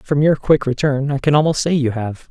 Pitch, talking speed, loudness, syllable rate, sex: 140 Hz, 260 wpm, -17 LUFS, 5.3 syllables/s, male